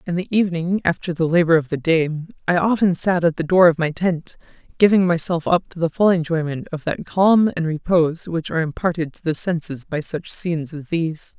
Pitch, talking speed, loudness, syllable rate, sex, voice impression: 170 Hz, 215 wpm, -19 LUFS, 5.6 syllables/s, female, feminine, adult-like, tensed, slightly powerful, slightly hard, clear, intellectual, slightly sincere, unique, slightly sharp